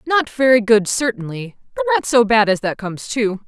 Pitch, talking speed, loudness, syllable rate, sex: 230 Hz, 205 wpm, -17 LUFS, 5.3 syllables/s, female